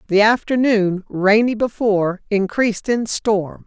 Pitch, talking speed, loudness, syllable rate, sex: 210 Hz, 115 wpm, -18 LUFS, 4.2 syllables/s, female